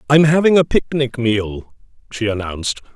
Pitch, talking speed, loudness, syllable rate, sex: 125 Hz, 140 wpm, -17 LUFS, 4.8 syllables/s, male